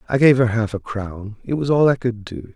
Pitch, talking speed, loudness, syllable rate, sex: 115 Hz, 280 wpm, -19 LUFS, 5.2 syllables/s, male